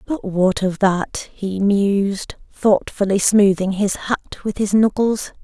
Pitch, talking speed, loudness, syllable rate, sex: 200 Hz, 145 wpm, -18 LUFS, 3.5 syllables/s, female